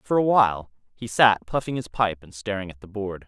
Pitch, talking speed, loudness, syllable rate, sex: 105 Hz, 240 wpm, -23 LUFS, 5.5 syllables/s, male